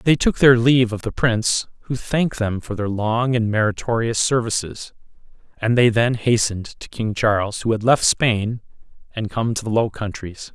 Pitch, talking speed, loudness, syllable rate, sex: 115 Hz, 190 wpm, -19 LUFS, 4.9 syllables/s, male